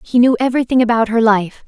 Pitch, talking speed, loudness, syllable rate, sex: 235 Hz, 215 wpm, -14 LUFS, 6.5 syllables/s, female